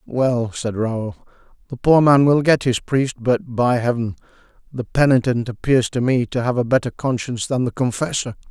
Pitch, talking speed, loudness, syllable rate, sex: 125 Hz, 185 wpm, -19 LUFS, 4.9 syllables/s, male